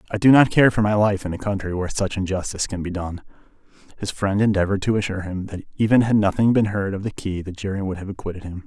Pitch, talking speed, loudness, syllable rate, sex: 100 Hz, 255 wpm, -21 LUFS, 6.9 syllables/s, male